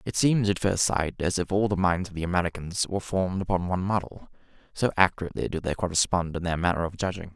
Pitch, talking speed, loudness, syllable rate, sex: 90 Hz, 230 wpm, -26 LUFS, 6.6 syllables/s, male